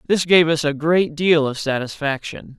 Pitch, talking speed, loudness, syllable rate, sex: 155 Hz, 185 wpm, -18 LUFS, 4.6 syllables/s, male